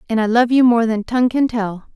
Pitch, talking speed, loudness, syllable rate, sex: 230 Hz, 275 wpm, -16 LUFS, 5.9 syllables/s, female